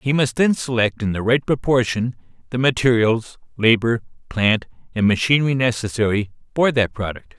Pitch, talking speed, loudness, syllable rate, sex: 120 Hz, 145 wpm, -19 LUFS, 5.1 syllables/s, male